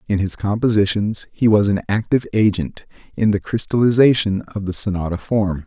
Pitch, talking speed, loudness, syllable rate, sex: 105 Hz, 160 wpm, -18 LUFS, 5.3 syllables/s, male